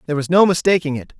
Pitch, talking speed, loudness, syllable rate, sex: 160 Hz, 250 wpm, -16 LUFS, 8.1 syllables/s, male